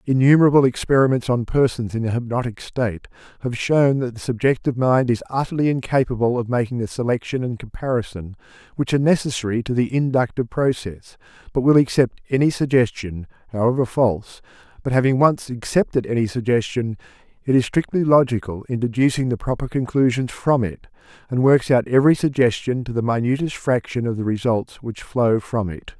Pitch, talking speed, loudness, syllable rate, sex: 125 Hz, 160 wpm, -20 LUFS, 5.8 syllables/s, male